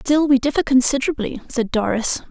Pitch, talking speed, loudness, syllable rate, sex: 260 Hz, 155 wpm, -18 LUFS, 5.6 syllables/s, female